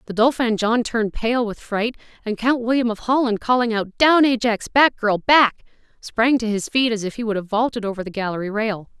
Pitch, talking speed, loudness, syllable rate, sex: 225 Hz, 220 wpm, -20 LUFS, 5.4 syllables/s, female